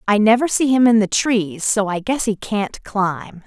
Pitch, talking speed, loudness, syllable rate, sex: 215 Hz, 225 wpm, -18 LUFS, 4.2 syllables/s, female